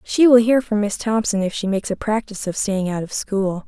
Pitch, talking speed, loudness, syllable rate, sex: 210 Hz, 260 wpm, -19 LUFS, 5.6 syllables/s, female